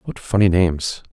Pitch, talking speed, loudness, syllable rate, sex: 95 Hz, 155 wpm, -19 LUFS, 5.0 syllables/s, male